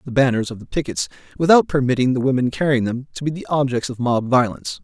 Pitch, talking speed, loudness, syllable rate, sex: 130 Hz, 235 wpm, -19 LUFS, 6.6 syllables/s, male